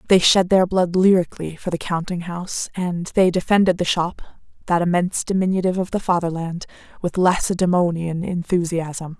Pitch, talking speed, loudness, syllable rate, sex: 175 Hz, 150 wpm, -20 LUFS, 5.4 syllables/s, female